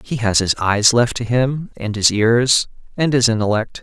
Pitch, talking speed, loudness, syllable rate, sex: 115 Hz, 205 wpm, -16 LUFS, 4.4 syllables/s, male